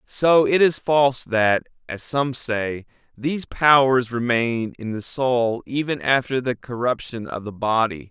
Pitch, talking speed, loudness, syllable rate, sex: 125 Hz, 155 wpm, -21 LUFS, 4.0 syllables/s, male